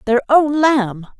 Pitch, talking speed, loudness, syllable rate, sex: 255 Hz, 150 wpm, -15 LUFS, 3.4 syllables/s, female